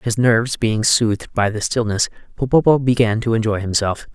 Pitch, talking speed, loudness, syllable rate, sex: 115 Hz, 175 wpm, -18 LUFS, 5.4 syllables/s, male